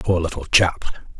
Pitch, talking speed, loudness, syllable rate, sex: 85 Hz, 150 wpm, -19 LUFS, 5.1 syllables/s, male